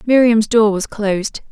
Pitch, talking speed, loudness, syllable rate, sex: 220 Hz, 160 wpm, -15 LUFS, 4.4 syllables/s, female